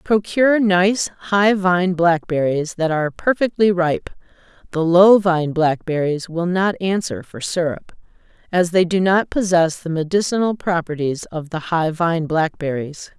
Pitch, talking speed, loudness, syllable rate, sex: 175 Hz, 135 wpm, -18 LUFS, 4.2 syllables/s, female